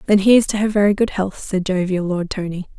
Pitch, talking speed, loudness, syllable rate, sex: 195 Hz, 235 wpm, -18 LUFS, 5.9 syllables/s, female